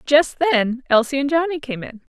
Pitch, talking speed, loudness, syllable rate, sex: 275 Hz, 195 wpm, -19 LUFS, 4.8 syllables/s, female